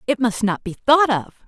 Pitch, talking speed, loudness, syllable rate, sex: 240 Hz, 245 wpm, -19 LUFS, 5.2 syllables/s, female